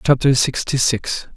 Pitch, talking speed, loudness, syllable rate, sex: 130 Hz, 130 wpm, -18 LUFS, 4.2 syllables/s, male